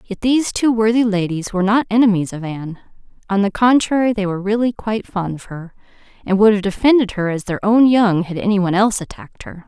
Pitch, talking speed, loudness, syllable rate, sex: 205 Hz, 210 wpm, -17 LUFS, 6.2 syllables/s, female